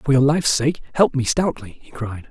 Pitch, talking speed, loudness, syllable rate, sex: 135 Hz, 235 wpm, -19 LUFS, 5.2 syllables/s, male